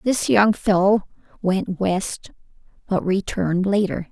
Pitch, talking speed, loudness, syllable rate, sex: 190 Hz, 115 wpm, -20 LUFS, 3.9 syllables/s, female